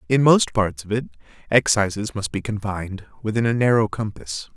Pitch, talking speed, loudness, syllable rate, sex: 105 Hz, 170 wpm, -21 LUFS, 5.2 syllables/s, male